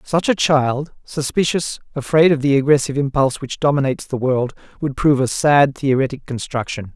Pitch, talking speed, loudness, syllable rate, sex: 140 Hz, 165 wpm, -18 LUFS, 5.5 syllables/s, male